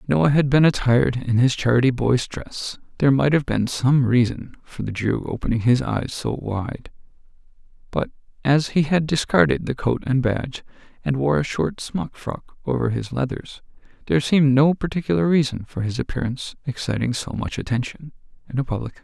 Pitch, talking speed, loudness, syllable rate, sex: 130 Hz, 185 wpm, -21 LUFS, 5.4 syllables/s, male